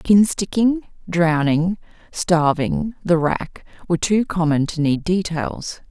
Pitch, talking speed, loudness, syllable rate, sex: 175 Hz, 120 wpm, -20 LUFS, 3.7 syllables/s, female